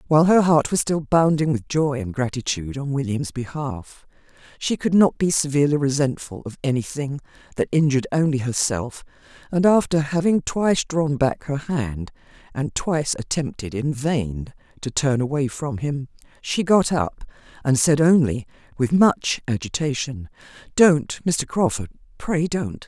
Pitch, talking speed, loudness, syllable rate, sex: 140 Hz, 150 wpm, -21 LUFS, 4.7 syllables/s, female